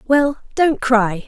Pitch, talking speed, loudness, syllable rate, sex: 255 Hz, 140 wpm, -17 LUFS, 3.2 syllables/s, female